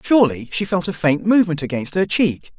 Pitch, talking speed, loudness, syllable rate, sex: 175 Hz, 210 wpm, -19 LUFS, 5.8 syllables/s, male